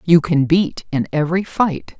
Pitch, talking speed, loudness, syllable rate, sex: 160 Hz, 180 wpm, -18 LUFS, 4.4 syllables/s, female